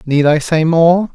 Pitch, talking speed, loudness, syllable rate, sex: 160 Hz, 210 wpm, -12 LUFS, 4.0 syllables/s, male